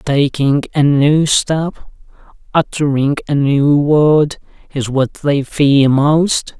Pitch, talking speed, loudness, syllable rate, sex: 145 Hz, 120 wpm, -14 LUFS, 3.0 syllables/s, male